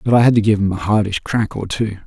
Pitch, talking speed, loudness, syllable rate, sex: 105 Hz, 320 wpm, -17 LUFS, 6.3 syllables/s, male